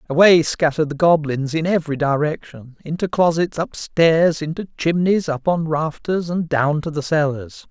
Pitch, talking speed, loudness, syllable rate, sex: 160 Hz, 155 wpm, -19 LUFS, 4.7 syllables/s, male